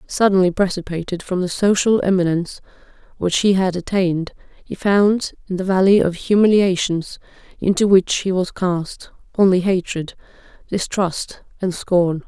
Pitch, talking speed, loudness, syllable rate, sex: 185 Hz, 130 wpm, -18 LUFS, 4.7 syllables/s, female